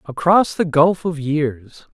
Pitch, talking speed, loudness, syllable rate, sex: 150 Hz, 155 wpm, -17 LUFS, 3.4 syllables/s, male